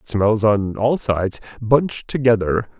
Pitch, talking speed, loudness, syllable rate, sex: 110 Hz, 130 wpm, -19 LUFS, 4.1 syllables/s, male